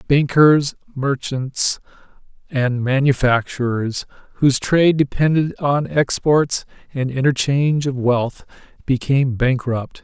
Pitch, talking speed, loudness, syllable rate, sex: 135 Hz, 90 wpm, -18 LUFS, 4.0 syllables/s, male